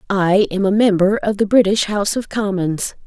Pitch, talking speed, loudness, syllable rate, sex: 200 Hz, 195 wpm, -16 LUFS, 5.1 syllables/s, female